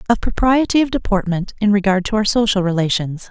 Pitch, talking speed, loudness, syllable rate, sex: 205 Hz, 180 wpm, -17 LUFS, 5.9 syllables/s, female